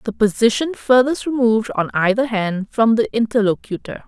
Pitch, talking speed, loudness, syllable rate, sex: 225 Hz, 145 wpm, -18 LUFS, 5.2 syllables/s, female